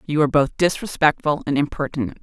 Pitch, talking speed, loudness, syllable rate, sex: 145 Hz, 160 wpm, -20 LUFS, 6.2 syllables/s, female